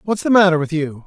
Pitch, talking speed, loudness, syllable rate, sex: 170 Hz, 280 wpm, -16 LUFS, 6.3 syllables/s, male